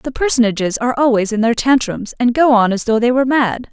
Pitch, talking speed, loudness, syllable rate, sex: 240 Hz, 240 wpm, -15 LUFS, 6.1 syllables/s, female